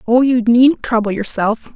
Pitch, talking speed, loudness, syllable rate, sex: 235 Hz, 170 wpm, -14 LUFS, 4.4 syllables/s, female